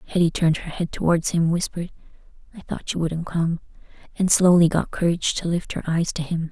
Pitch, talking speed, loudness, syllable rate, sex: 170 Hz, 205 wpm, -22 LUFS, 5.9 syllables/s, female